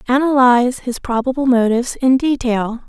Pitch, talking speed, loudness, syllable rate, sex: 250 Hz, 125 wpm, -16 LUFS, 5.2 syllables/s, female